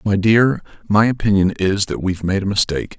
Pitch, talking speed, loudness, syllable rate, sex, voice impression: 100 Hz, 200 wpm, -17 LUFS, 5.9 syllables/s, male, masculine, middle-aged, thick, tensed, powerful, slightly hard, clear, intellectual, calm, wild, lively, strict